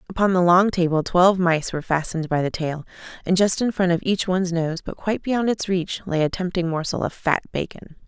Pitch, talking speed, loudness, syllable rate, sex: 180 Hz, 230 wpm, -21 LUFS, 5.8 syllables/s, female